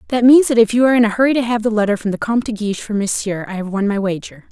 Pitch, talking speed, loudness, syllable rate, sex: 220 Hz, 330 wpm, -16 LUFS, 7.6 syllables/s, female